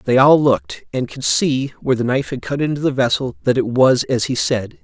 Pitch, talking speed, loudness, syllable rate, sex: 125 Hz, 250 wpm, -17 LUFS, 5.6 syllables/s, male